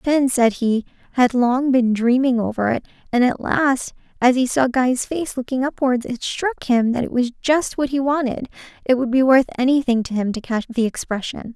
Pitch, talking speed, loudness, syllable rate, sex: 250 Hz, 210 wpm, -19 LUFS, 5.1 syllables/s, female